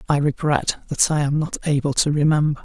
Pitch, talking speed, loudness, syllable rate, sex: 145 Hz, 205 wpm, -20 LUFS, 5.6 syllables/s, male